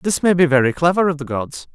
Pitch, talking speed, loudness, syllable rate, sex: 155 Hz, 275 wpm, -17 LUFS, 6.2 syllables/s, male